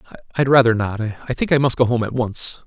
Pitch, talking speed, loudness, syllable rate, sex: 120 Hz, 225 wpm, -18 LUFS, 6.4 syllables/s, male